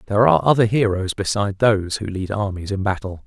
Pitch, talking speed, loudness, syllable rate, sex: 100 Hz, 200 wpm, -19 LUFS, 6.5 syllables/s, male